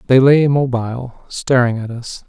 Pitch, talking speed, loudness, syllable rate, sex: 125 Hz, 130 wpm, -15 LUFS, 4.9 syllables/s, male